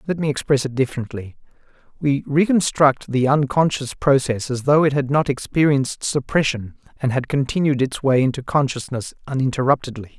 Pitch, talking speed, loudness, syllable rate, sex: 135 Hz, 145 wpm, -20 LUFS, 5.4 syllables/s, male